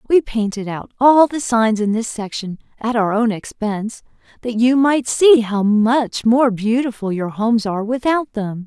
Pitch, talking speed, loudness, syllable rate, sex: 230 Hz, 180 wpm, -17 LUFS, 4.5 syllables/s, female